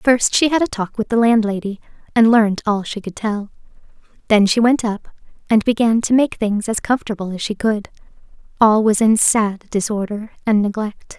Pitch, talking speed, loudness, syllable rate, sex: 215 Hz, 190 wpm, -17 LUFS, 5.2 syllables/s, female